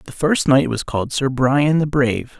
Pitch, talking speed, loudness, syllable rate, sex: 135 Hz, 225 wpm, -18 LUFS, 4.7 syllables/s, male